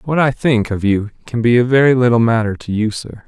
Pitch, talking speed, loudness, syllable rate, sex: 120 Hz, 255 wpm, -15 LUFS, 5.5 syllables/s, male